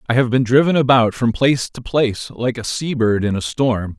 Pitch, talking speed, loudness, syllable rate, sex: 125 Hz, 225 wpm, -17 LUFS, 5.3 syllables/s, male